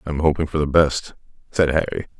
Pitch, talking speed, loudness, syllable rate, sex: 75 Hz, 190 wpm, -20 LUFS, 5.6 syllables/s, male